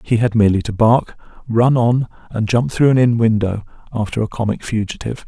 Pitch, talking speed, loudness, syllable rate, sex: 115 Hz, 195 wpm, -17 LUFS, 5.7 syllables/s, male